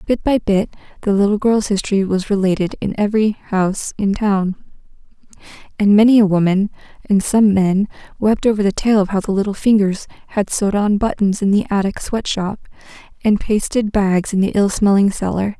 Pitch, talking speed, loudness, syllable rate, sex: 205 Hz, 175 wpm, -17 LUFS, 5.3 syllables/s, female